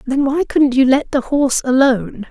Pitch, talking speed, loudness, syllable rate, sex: 265 Hz, 210 wpm, -15 LUFS, 5.3 syllables/s, female